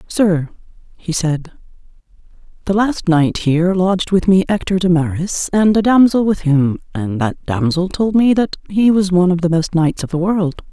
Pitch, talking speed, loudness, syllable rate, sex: 180 Hz, 190 wpm, -15 LUFS, 5.0 syllables/s, female